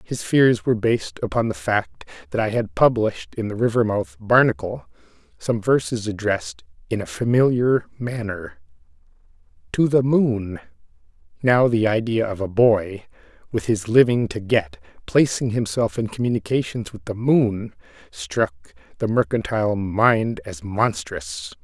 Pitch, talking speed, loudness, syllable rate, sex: 115 Hz, 135 wpm, -21 LUFS, 4.5 syllables/s, male